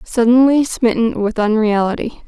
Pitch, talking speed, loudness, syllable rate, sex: 230 Hz, 105 wpm, -15 LUFS, 4.6 syllables/s, female